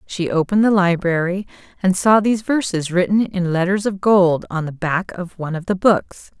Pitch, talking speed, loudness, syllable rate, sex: 185 Hz, 195 wpm, -18 LUFS, 5.2 syllables/s, female